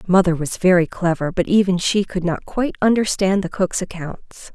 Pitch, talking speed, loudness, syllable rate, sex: 185 Hz, 185 wpm, -19 LUFS, 5.1 syllables/s, female